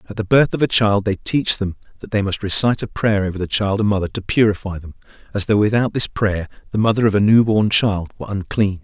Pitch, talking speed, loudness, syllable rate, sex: 105 Hz, 245 wpm, -18 LUFS, 6.1 syllables/s, male